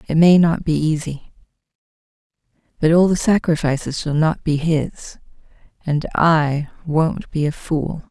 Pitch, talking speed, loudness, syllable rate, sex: 155 Hz, 140 wpm, -18 LUFS, 4.2 syllables/s, female